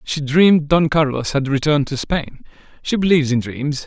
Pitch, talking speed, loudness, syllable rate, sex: 145 Hz, 185 wpm, -17 LUFS, 5.3 syllables/s, male